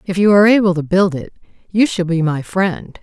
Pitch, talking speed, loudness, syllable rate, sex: 185 Hz, 240 wpm, -15 LUFS, 5.5 syllables/s, female